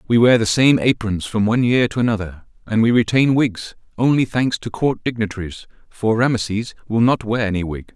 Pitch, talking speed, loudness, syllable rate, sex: 110 Hz, 195 wpm, -18 LUFS, 5.4 syllables/s, male